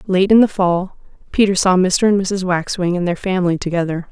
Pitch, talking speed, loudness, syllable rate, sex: 185 Hz, 205 wpm, -16 LUFS, 5.5 syllables/s, female